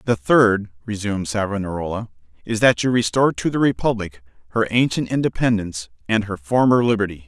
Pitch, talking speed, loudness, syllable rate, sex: 105 Hz, 150 wpm, -20 LUFS, 5.9 syllables/s, male